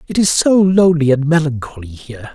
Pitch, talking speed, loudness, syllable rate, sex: 150 Hz, 180 wpm, -13 LUFS, 5.9 syllables/s, male